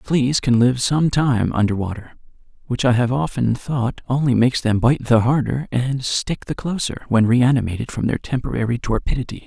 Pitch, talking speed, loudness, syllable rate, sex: 125 Hz, 175 wpm, -19 LUFS, 5.0 syllables/s, male